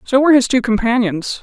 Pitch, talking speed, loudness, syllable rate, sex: 240 Hz, 210 wpm, -14 LUFS, 6.0 syllables/s, female